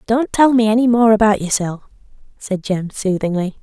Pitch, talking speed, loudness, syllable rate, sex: 210 Hz, 165 wpm, -16 LUFS, 5.0 syllables/s, female